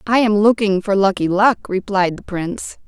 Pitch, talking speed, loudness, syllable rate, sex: 200 Hz, 190 wpm, -17 LUFS, 4.9 syllables/s, female